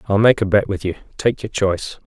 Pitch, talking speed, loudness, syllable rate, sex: 100 Hz, 255 wpm, -19 LUFS, 6.0 syllables/s, male